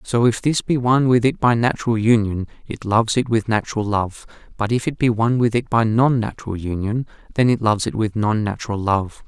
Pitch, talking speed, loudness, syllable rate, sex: 115 Hz, 225 wpm, -19 LUFS, 5.9 syllables/s, male